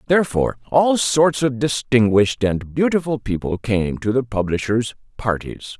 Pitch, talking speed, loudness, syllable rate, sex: 120 Hz, 135 wpm, -19 LUFS, 4.7 syllables/s, male